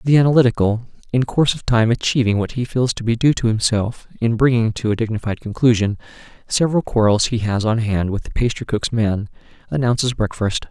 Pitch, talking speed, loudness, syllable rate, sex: 115 Hz, 185 wpm, -18 LUFS, 5.8 syllables/s, male